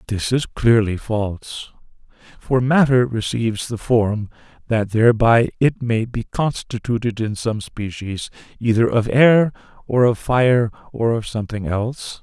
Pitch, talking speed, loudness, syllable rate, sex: 115 Hz, 140 wpm, -19 LUFS, 4.4 syllables/s, male